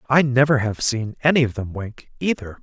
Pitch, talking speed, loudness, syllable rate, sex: 125 Hz, 205 wpm, -20 LUFS, 5.4 syllables/s, male